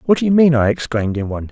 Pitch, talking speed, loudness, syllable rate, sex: 130 Hz, 315 wpm, -16 LUFS, 7.2 syllables/s, male